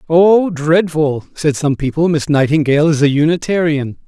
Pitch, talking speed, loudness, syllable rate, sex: 155 Hz, 145 wpm, -14 LUFS, 4.8 syllables/s, male